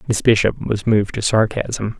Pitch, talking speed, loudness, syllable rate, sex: 105 Hz, 180 wpm, -18 LUFS, 4.9 syllables/s, male